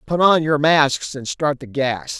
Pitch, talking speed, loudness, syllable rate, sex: 145 Hz, 220 wpm, -18 LUFS, 3.9 syllables/s, male